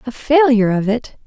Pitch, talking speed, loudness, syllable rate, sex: 240 Hz, 190 wpm, -15 LUFS, 5.5 syllables/s, female